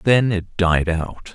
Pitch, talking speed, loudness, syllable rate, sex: 95 Hz, 180 wpm, -19 LUFS, 3.5 syllables/s, male